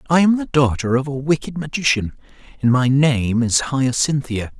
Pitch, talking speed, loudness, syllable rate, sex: 135 Hz, 170 wpm, -18 LUFS, 4.8 syllables/s, male